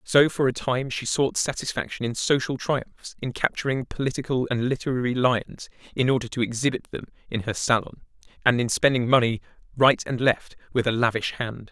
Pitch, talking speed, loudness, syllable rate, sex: 125 Hz, 180 wpm, -24 LUFS, 5.4 syllables/s, male